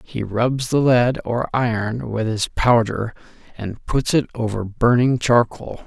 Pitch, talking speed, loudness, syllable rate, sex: 115 Hz, 155 wpm, -19 LUFS, 3.8 syllables/s, male